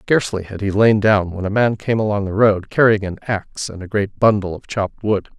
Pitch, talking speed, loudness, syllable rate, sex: 105 Hz, 245 wpm, -18 LUFS, 5.7 syllables/s, male